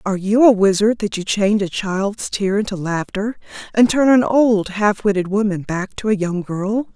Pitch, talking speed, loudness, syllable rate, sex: 205 Hz, 205 wpm, -18 LUFS, 4.9 syllables/s, female